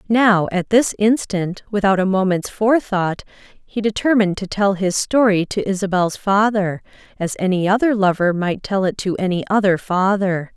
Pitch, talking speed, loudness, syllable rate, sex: 195 Hz, 155 wpm, -18 LUFS, 4.8 syllables/s, female